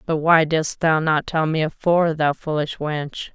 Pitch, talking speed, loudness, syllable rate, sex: 155 Hz, 195 wpm, -20 LUFS, 4.3 syllables/s, female